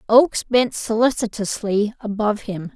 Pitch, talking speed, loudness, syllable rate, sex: 220 Hz, 110 wpm, -20 LUFS, 4.9 syllables/s, female